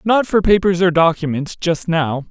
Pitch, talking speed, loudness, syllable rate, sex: 175 Hz, 155 wpm, -16 LUFS, 4.6 syllables/s, male